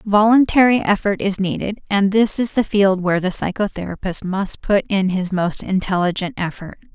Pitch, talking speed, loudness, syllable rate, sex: 195 Hz, 165 wpm, -18 LUFS, 5.1 syllables/s, female